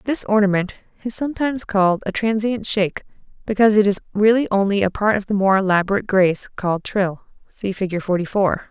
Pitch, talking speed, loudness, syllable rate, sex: 200 Hz, 180 wpm, -19 LUFS, 6.0 syllables/s, female